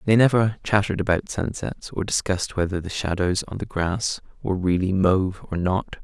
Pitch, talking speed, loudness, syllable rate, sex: 95 Hz, 180 wpm, -23 LUFS, 5.4 syllables/s, male